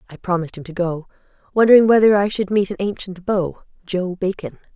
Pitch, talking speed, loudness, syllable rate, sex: 190 Hz, 190 wpm, -18 LUFS, 6.0 syllables/s, female